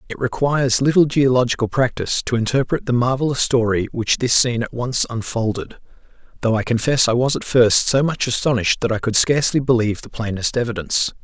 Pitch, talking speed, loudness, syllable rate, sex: 120 Hz, 180 wpm, -18 LUFS, 6.0 syllables/s, male